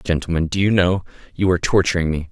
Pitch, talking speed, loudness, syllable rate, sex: 90 Hz, 205 wpm, -19 LUFS, 6.8 syllables/s, male